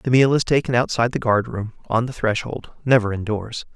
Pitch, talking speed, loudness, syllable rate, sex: 115 Hz, 210 wpm, -20 LUFS, 5.6 syllables/s, male